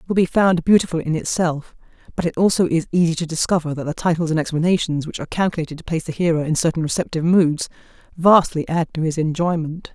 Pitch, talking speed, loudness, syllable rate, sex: 165 Hz, 210 wpm, -19 LUFS, 6.5 syllables/s, female